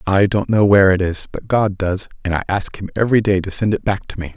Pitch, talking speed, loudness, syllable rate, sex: 95 Hz, 290 wpm, -17 LUFS, 6.2 syllables/s, male